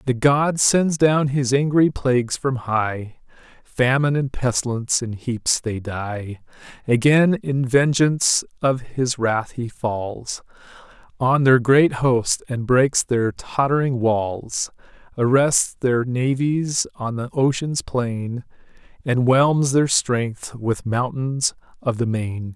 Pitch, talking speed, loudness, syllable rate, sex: 125 Hz, 130 wpm, -20 LUFS, 3.4 syllables/s, male